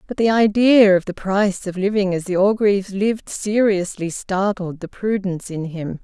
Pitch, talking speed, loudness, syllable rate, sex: 195 Hz, 180 wpm, -19 LUFS, 4.9 syllables/s, female